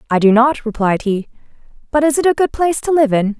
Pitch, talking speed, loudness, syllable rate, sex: 255 Hz, 250 wpm, -15 LUFS, 6.2 syllables/s, female